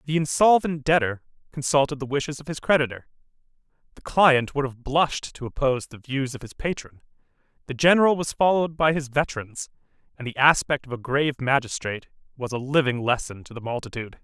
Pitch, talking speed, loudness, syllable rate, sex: 135 Hz, 175 wpm, -23 LUFS, 6.1 syllables/s, male